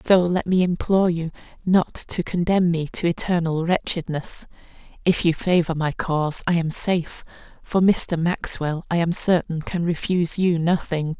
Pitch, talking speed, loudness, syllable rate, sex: 170 Hz, 160 wpm, -21 LUFS, 4.7 syllables/s, female